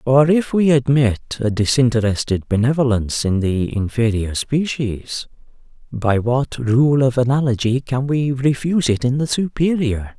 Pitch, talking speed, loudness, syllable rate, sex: 125 Hz, 135 wpm, -18 LUFS, 4.5 syllables/s, male